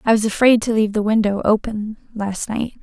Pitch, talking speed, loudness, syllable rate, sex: 215 Hz, 210 wpm, -18 LUFS, 5.7 syllables/s, female